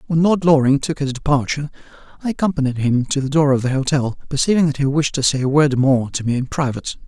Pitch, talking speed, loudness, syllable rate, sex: 140 Hz, 240 wpm, -18 LUFS, 6.4 syllables/s, male